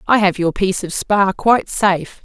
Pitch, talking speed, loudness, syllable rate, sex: 195 Hz, 215 wpm, -16 LUFS, 5.3 syllables/s, female